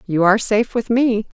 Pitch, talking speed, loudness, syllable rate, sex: 215 Hz, 215 wpm, -17 LUFS, 5.7 syllables/s, female